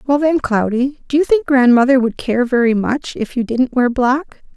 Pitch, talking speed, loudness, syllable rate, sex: 255 Hz, 210 wpm, -15 LUFS, 4.7 syllables/s, female